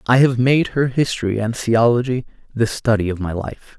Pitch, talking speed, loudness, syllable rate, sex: 120 Hz, 190 wpm, -18 LUFS, 5.0 syllables/s, male